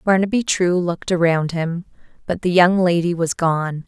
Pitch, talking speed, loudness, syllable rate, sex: 175 Hz, 170 wpm, -18 LUFS, 4.8 syllables/s, female